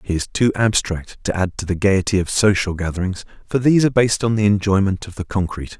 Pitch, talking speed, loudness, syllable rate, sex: 100 Hz, 230 wpm, -19 LUFS, 6.3 syllables/s, male